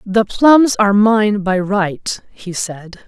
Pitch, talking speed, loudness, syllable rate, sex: 210 Hz, 155 wpm, -14 LUFS, 3.2 syllables/s, female